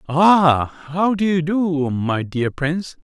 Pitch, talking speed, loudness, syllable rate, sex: 160 Hz, 155 wpm, -18 LUFS, 3.2 syllables/s, male